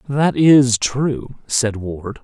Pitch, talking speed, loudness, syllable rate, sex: 120 Hz, 135 wpm, -16 LUFS, 2.5 syllables/s, male